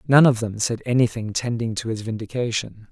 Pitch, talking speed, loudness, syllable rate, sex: 115 Hz, 185 wpm, -22 LUFS, 5.5 syllables/s, male